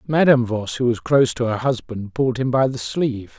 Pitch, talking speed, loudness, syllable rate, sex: 125 Hz, 230 wpm, -20 LUFS, 5.8 syllables/s, male